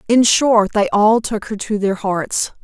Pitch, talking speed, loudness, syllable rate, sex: 210 Hz, 205 wpm, -16 LUFS, 4.0 syllables/s, female